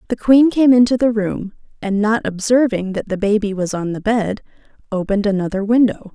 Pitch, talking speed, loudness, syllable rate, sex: 215 Hz, 185 wpm, -17 LUFS, 5.4 syllables/s, female